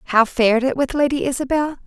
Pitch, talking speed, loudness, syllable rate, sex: 265 Hz, 195 wpm, -18 LUFS, 5.7 syllables/s, female